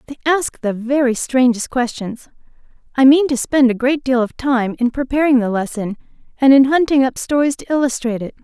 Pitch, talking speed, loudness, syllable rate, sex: 260 Hz, 190 wpm, -16 LUFS, 5.4 syllables/s, female